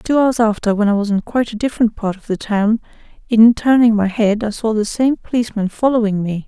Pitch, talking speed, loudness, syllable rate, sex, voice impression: 220 Hz, 230 wpm, -16 LUFS, 5.9 syllables/s, female, very feminine, slightly young, very thin, slightly relaxed, slightly weak, dark, soft, clear, slightly fluent, slightly raspy, cute, intellectual, refreshing, very sincere, calm, friendly, reassuring, unique, very elegant, sweet, slightly lively, very kind, very modest